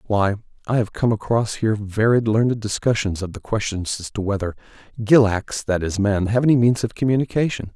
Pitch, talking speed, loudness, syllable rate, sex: 110 Hz, 185 wpm, -20 LUFS, 5.6 syllables/s, male